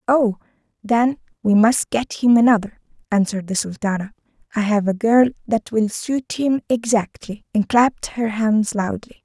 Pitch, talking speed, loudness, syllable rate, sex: 220 Hz, 155 wpm, -19 LUFS, 4.7 syllables/s, female